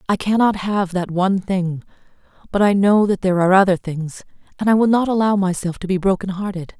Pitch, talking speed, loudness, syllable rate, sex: 190 Hz, 210 wpm, -18 LUFS, 6.0 syllables/s, female